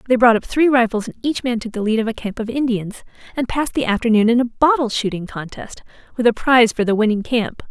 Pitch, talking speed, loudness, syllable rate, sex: 235 Hz, 250 wpm, -18 LUFS, 6.2 syllables/s, female